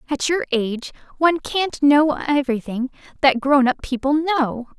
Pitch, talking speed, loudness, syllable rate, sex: 280 Hz, 150 wpm, -19 LUFS, 4.7 syllables/s, female